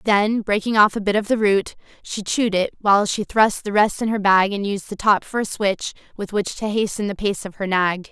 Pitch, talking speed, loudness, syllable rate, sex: 205 Hz, 260 wpm, -20 LUFS, 5.3 syllables/s, female